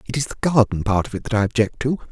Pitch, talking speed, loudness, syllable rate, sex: 120 Hz, 310 wpm, -20 LUFS, 7.1 syllables/s, male